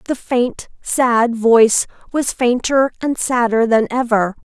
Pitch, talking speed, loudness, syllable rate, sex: 240 Hz, 130 wpm, -16 LUFS, 3.8 syllables/s, female